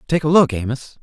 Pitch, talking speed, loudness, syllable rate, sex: 135 Hz, 235 wpm, -17 LUFS, 5.8 syllables/s, male